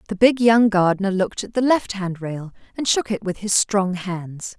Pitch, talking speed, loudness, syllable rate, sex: 200 Hz, 225 wpm, -20 LUFS, 4.8 syllables/s, female